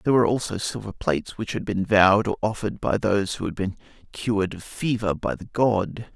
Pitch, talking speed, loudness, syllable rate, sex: 105 Hz, 215 wpm, -24 LUFS, 5.9 syllables/s, male